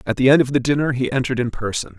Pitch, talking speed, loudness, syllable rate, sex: 130 Hz, 300 wpm, -19 LUFS, 7.5 syllables/s, male